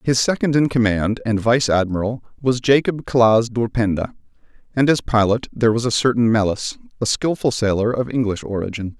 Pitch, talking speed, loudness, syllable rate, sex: 115 Hz, 165 wpm, -19 LUFS, 5.3 syllables/s, male